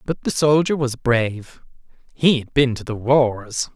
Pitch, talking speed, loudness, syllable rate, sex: 125 Hz, 175 wpm, -19 LUFS, 4.1 syllables/s, male